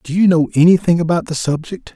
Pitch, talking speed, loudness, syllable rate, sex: 165 Hz, 215 wpm, -15 LUFS, 6.0 syllables/s, male